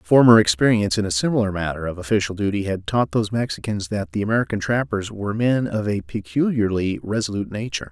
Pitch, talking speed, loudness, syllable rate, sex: 100 Hz, 180 wpm, -21 LUFS, 6.4 syllables/s, male